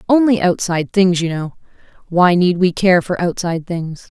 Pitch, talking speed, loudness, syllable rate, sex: 180 Hz, 170 wpm, -16 LUFS, 5.0 syllables/s, female